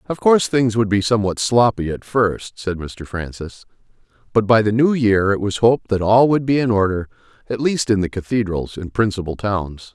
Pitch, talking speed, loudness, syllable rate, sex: 105 Hz, 205 wpm, -18 LUFS, 5.2 syllables/s, male